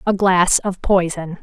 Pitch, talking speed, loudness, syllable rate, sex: 185 Hz, 170 wpm, -17 LUFS, 3.9 syllables/s, female